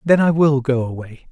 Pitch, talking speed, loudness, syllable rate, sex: 140 Hz, 230 wpm, -17 LUFS, 5.0 syllables/s, male